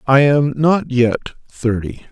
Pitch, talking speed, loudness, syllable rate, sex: 135 Hz, 140 wpm, -16 LUFS, 3.9 syllables/s, male